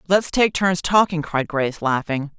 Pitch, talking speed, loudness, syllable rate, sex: 165 Hz, 175 wpm, -20 LUFS, 4.6 syllables/s, female